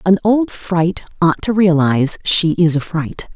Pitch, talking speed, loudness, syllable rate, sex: 175 Hz, 180 wpm, -15 LUFS, 4.1 syllables/s, female